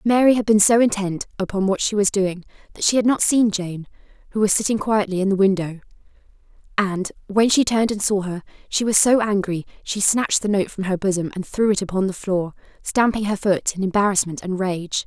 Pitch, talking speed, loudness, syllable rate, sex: 200 Hz, 215 wpm, -20 LUFS, 5.6 syllables/s, female